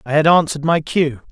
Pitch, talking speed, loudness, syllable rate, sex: 155 Hz, 230 wpm, -16 LUFS, 6.2 syllables/s, male